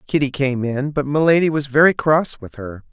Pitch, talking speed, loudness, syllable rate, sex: 140 Hz, 205 wpm, -17 LUFS, 5.1 syllables/s, male